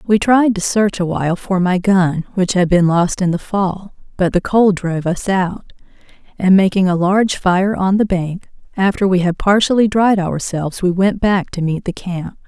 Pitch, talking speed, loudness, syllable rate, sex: 190 Hz, 205 wpm, -16 LUFS, 4.7 syllables/s, female